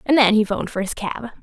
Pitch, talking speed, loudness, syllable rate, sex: 220 Hz, 295 wpm, -20 LUFS, 6.5 syllables/s, female